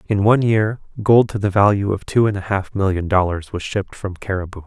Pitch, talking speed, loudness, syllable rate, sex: 100 Hz, 230 wpm, -18 LUFS, 5.8 syllables/s, male